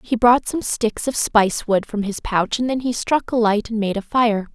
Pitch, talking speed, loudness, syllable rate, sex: 225 Hz, 265 wpm, -19 LUFS, 4.8 syllables/s, female